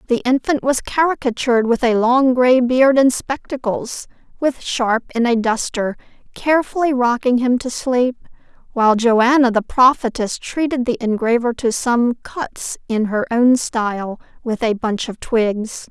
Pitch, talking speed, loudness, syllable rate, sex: 245 Hz, 150 wpm, -17 LUFS, 4.3 syllables/s, female